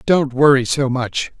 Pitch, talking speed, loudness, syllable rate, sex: 135 Hz, 170 wpm, -16 LUFS, 4.1 syllables/s, male